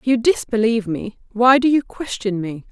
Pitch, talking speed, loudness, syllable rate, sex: 230 Hz, 200 wpm, -18 LUFS, 5.2 syllables/s, female